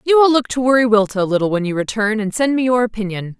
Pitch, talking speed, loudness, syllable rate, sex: 225 Hz, 265 wpm, -16 LUFS, 6.7 syllables/s, female